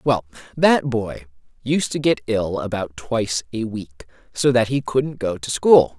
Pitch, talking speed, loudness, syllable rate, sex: 120 Hz, 180 wpm, -20 LUFS, 4.2 syllables/s, male